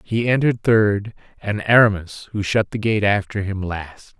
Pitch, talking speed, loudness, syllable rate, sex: 105 Hz, 170 wpm, -19 LUFS, 4.5 syllables/s, male